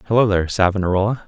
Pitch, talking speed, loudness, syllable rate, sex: 100 Hz, 140 wpm, -18 LUFS, 8.4 syllables/s, male